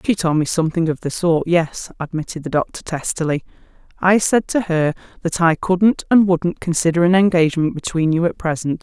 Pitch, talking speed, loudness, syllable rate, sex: 170 Hz, 185 wpm, -18 LUFS, 5.4 syllables/s, female